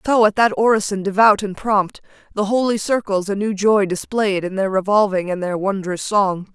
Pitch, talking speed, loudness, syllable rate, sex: 200 Hz, 190 wpm, -18 LUFS, 5.0 syllables/s, female